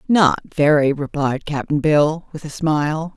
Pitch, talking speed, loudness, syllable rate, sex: 150 Hz, 150 wpm, -18 LUFS, 3.8 syllables/s, female